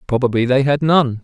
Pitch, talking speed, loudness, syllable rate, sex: 130 Hz, 195 wpm, -16 LUFS, 5.5 syllables/s, male